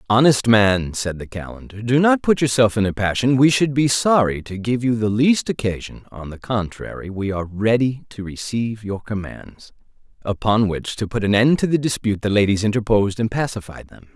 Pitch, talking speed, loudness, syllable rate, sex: 110 Hz, 200 wpm, -19 LUFS, 5.3 syllables/s, male